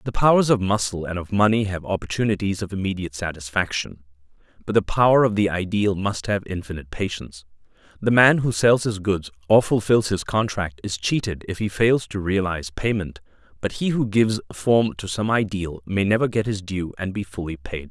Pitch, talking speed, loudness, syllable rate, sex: 100 Hz, 190 wpm, -22 LUFS, 5.5 syllables/s, male